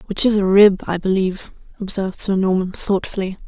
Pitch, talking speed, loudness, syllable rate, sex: 195 Hz, 175 wpm, -18 LUFS, 5.8 syllables/s, female